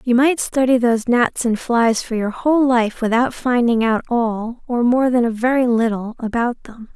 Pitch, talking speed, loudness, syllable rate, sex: 240 Hz, 180 wpm, -18 LUFS, 4.6 syllables/s, female